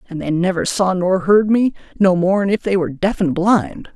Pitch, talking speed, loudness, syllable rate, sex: 190 Hz, 230 wpm, -17 LUFS, 5.1 syllables/s, female